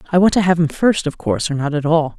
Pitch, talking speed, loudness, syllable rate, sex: 160 Hz, 330 wpm, -17 LUFS, 6.6 syllables/s, female